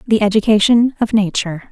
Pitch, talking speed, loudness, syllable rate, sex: 210 Hz, 140 wpm, -14 LUFS, 6.3 syllables/s, female